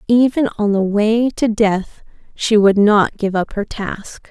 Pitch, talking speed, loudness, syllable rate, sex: 210 Hz, 180 wpm, -16 LUFS, 3.6 syllables/s, female